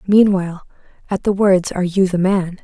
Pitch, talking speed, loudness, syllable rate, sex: 190 Hz, 180 wpm, -16 LUFS, 5.5 syllables/s, female